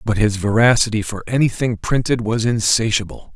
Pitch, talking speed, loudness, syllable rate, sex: 110 Hz, 145 wpm, -18 LUFS, 5.3 syllables/s, male